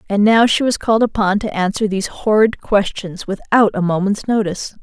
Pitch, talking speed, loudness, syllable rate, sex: 205 Hz, 185 wpm, -16 LUFS, 5.4 syllables/s, female